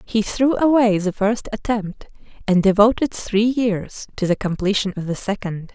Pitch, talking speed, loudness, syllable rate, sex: 210 Hz, 165 wpm, -19 LUFS, 4.5 syllables/s, female